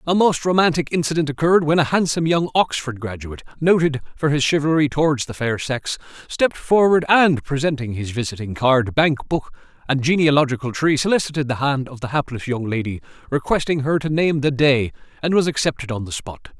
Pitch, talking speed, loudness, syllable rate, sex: 145 Hz, 180 wpm, -19 LUFS, 5.8 syllables/s, male